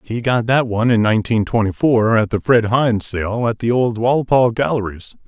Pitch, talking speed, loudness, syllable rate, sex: 115 Hz, 205 wpm, -16 LUFS, 5.3 syllables/s, male